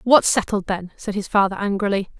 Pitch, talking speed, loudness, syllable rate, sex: 200 Hz, 190 wpm, -21 LUFS, 5.5 syllables/s, female